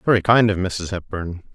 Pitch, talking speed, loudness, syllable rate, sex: 95 Hz, 195 wpm, -20 LUFS, 5.2 syllables/s, male